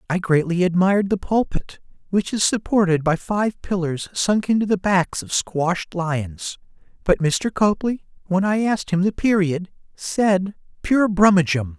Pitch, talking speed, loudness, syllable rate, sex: 185 Hz, 155 wpm, -20 LUFS, 4.4 syllables/s, male